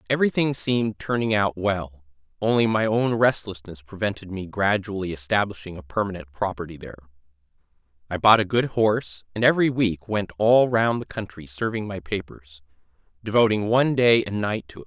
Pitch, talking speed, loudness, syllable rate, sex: 100 Hz, 160 wpm, -23 LUFS, 3.6 syllables/s, male